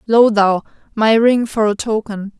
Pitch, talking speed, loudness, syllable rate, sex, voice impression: 215 Hz, 175 wpm, -15 LUFS, 4.2 syllables/s, female, very feminine, slightly young, slightly adult-like, thin, slightly tensed, slightly weak, slightly dark, slightly soft, clear, slightly halting, cute, very intellectual, slightly refreshing, very sincere, calm, friendly, reassuring, slightly unique, elegant, sweet, kind, very modest